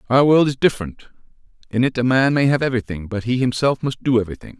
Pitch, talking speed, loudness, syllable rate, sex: 125 Hz, 220 wpm, -18 LUFS, 6.8 syllables/s, male